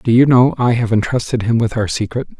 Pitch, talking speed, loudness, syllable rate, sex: 120 Hz, 250 wpm, -15 LUFS, 5.9 syllables/s, male